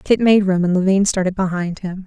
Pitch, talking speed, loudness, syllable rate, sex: 190 Hz, 235 wpm, -17 LUFS, 5.4 syllables/s, female